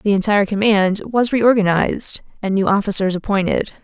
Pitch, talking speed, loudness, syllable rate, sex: 205 Hz, 140 wpm, -17 LUFS, 5.4 syllables/s, female